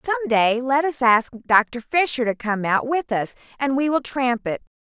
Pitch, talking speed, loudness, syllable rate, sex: 250 Hz, 210 wpm, -21 LUFS, 4.5 syllables/s, female